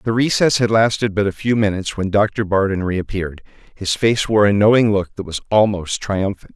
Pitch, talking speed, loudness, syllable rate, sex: 100 Hz, 200 wpm, -17 LUFS, 5.4 syllables/s, male